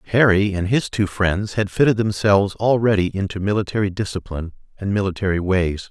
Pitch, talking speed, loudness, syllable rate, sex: 100 Hz, 150 wpm, -20 LUFS, 5.8 syllables/s, male